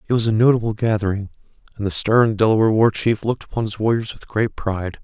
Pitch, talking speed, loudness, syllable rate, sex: 110 Hz, 215 wpm, -19 LUFS, 6.7 syllables/s, male